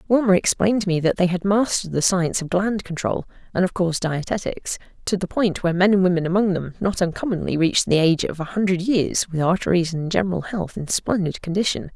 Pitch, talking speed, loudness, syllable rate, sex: 185 Hz, 215 wpm, -21 LUFS, 6.2 syllables/s, female